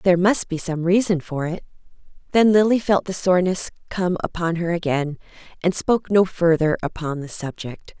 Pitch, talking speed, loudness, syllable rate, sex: 175 Hz, 175 wpm, -21 LUFS, 5.1 syllables/s, female